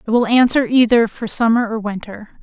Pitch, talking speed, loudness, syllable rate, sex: 225 Hz, 200 wpm, -15 LUFS, 5.3 syllables/s, female